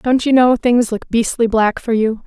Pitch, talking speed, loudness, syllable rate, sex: 235 Hz, 240 wpm, -15 LUFS, 4.5 syllables/s, female